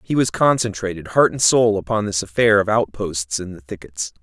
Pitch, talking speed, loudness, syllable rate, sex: 100 Hz, 200 wpm, -19 LUFS, 5.2 syllables/s, male